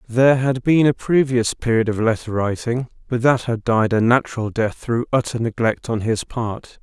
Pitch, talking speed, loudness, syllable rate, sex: 120 Hz, 195 wpm, -19 LUFS, 4.8 syllables/s, male